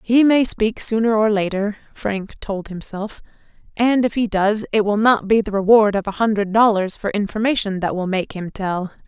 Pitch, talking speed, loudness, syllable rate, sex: 210 Hz, 200 wpm, -19 LUFS, 4.8 syllables/s, female